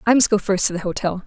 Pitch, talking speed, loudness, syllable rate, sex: 200 Hz, 335 wpm, -19 LUFS, 7.0 syllables/s, female